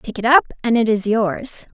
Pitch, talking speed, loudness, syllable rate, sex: 225 Hz, 235 wpm, -17 LUFS, 4.7 syllables/s, female